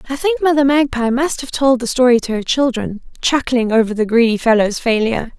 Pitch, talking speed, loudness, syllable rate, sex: 250 Hz, 200 wpm, -15 LUFS, 5.6 syllables/s, female